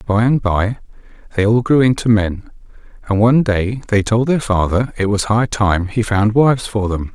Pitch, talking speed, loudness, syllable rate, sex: 110 Hz, 200 wpm, -16 LUFS, 4.9 syllables/s, male